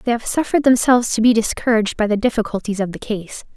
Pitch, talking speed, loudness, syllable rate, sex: 225 Hz, 220 wpm, -18 LUFS, 6.9 syllables/s, female